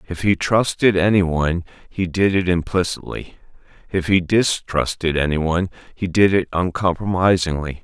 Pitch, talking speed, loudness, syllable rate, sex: 90 Hz, 125 wpm, -19 LUFS, 4.7 syllables/s, male